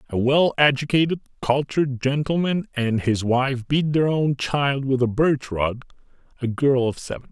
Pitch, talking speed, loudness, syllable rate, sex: 135 Hz, 165 wpm, -21 LUFS, 4.6 syllables/s, male